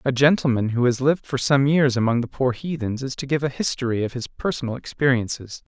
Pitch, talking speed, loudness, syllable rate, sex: 130 Hz, 220 wpm, -22 LUFS, 5.9 syllables/s, male